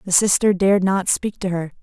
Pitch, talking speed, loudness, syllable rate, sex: 190 Hz, 230 wpm, -18 LUFS, 5.5 syllables/s, female